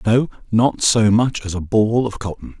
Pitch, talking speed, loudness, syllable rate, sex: 110 Hz, 185 wpm, -18 LUFS, 4.4 syllables/s, male